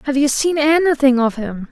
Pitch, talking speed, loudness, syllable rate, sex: 275 Hz, 210 wpm, -15 LUFS, 5.1 syllables/s, female